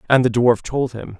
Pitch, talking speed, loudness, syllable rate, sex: 120 Hz, 250 wpm, -18 LUFS, 5.2 syllables/s, male